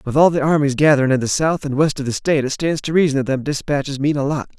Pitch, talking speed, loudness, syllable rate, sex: 145 Hz, 300 wpm, -18 LUFS, 6.8 syllables/s, male